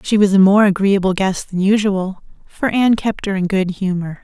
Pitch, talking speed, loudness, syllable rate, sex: 195 Hz, 215 wpm, -16 LUFS, 5.1 syllables/s, female